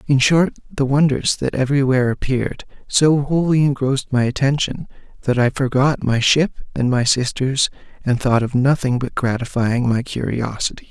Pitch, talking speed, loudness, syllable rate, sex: 130 Hz, 155 wpm, -18 LUFS, 5.1 syllables/s, male